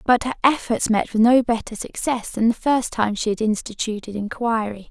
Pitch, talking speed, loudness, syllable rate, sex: 225 Hz, 195 wpm, -21 LUFS, 5.1 syllables/s, female